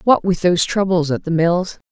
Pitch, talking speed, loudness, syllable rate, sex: 180 Hz, 220 wpm, -17 LUFS, 5.3 syllables/s, female